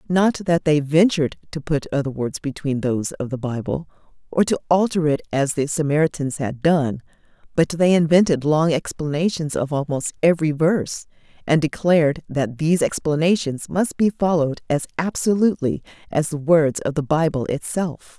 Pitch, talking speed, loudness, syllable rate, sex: 155 Hz, 160 wpm, -20 LUFS, 5.2 syllables/s, female